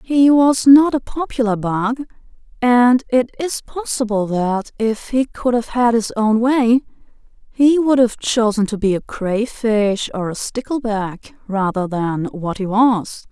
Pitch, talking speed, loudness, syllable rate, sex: 230 Hz, 160 wpm, -17 LUFS, 3.8 syllables/s, female